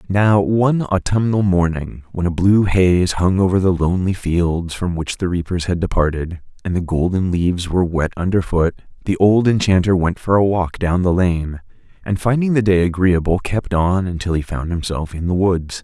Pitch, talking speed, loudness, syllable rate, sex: 90 Hz, 190 wpm, -17 LUFS, 5.0 syllables/s, male